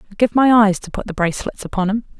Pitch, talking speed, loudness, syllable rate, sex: 210 Hz, 275 wpm, -17 LUFS, 7.1 syllables/s, female